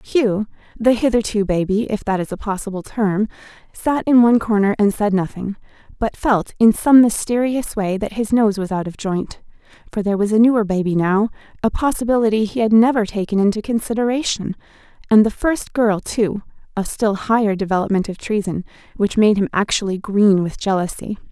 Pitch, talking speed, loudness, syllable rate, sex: 210 Hz, 175 wpm, -18 LUFS, 5.4 syllables/s, female